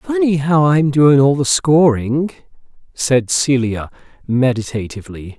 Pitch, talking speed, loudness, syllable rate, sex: 140 Hz, 110 wpm, -15 LUFS, 4.1 syllables/s, male